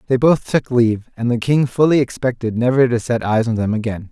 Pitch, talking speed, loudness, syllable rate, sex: 120 Hz, 235 wpm, -17 LUFS, 5.7 syllables/s, male